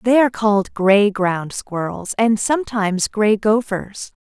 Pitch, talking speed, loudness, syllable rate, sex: 210 Hz, 140 wpm, -18 LUFS, 4.3 syllables/s, female